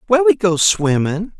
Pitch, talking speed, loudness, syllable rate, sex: 160 Hz, 170 wpm, -15 LUFS, 5.0 syllables/s, male